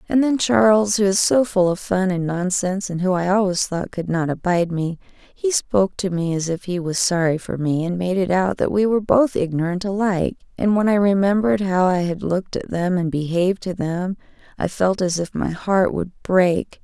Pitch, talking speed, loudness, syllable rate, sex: 185 Hz, 225 wpm, -20 LUFS, 5.2 syllables/s, female